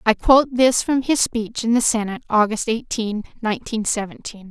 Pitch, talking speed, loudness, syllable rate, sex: 225 Hz, 175 wpm, -19 LUFS, 5.4 syllables/s, female